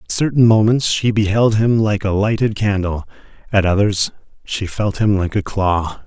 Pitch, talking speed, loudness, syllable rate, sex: 105 Hz, 180 wpm, -17 LUFS, 4.6 syllables/s, male